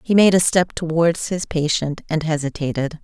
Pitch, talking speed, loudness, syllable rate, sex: 160 Hz, 180 wpm, -19 LUFS, 4.9 syllables/s, female